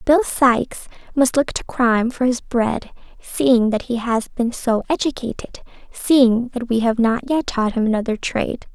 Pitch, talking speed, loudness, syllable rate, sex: 240 Hz, 180 wpm, -19 LUFS, 4.4 syllables/s, female